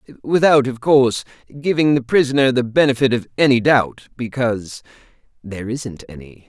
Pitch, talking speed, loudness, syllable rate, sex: 125 Hz, 140 wpm, -17 LUFS, 5.6 syllables/s, male